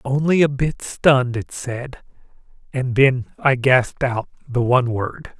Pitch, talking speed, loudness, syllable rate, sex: 130 Hz, 155 wpm, -19 LUFS, 4.2 syllables/s, male